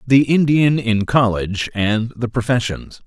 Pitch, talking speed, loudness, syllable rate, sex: 120 Hz, 135 wpm, -17 LUFS, 4.2 syllables/s, male